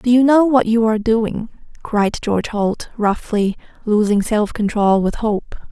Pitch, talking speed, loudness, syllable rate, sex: 220 Hz, 170 wpm, -17 LUFS, 4.3 syllables/s, female